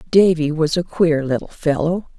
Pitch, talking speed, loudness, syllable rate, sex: 165 Hz, 165 wpm, -18 LUFS, 4.7 syllables/s, female